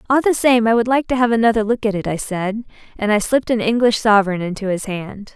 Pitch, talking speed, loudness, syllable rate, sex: 220 Hz, 260 wpm, -17 LUFS, 6.2 syllables/s, female